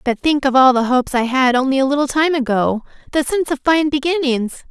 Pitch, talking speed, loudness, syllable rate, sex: 270 Hz, 230 wpm, -16 LUFS, 5.9 syllables/s, female